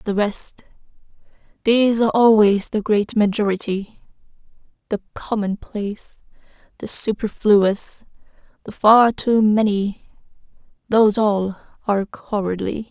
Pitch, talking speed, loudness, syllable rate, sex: 210 Hz, 95 wpm, -19 LUFS, 4.2 syllables/s, female